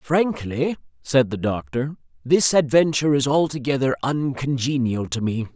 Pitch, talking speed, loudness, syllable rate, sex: 135 Hz, 120 wpm, -21 LUFS, 4.5 syllables/s, male